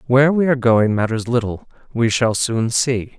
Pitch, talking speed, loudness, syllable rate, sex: 120 Hz, 190 wpm, -17 LUFS, 5.1 syllables/s, male